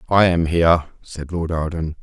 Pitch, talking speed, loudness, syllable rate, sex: 85 Hz, 180 wpm, -19 LUFS, 4.9 syllables/s, male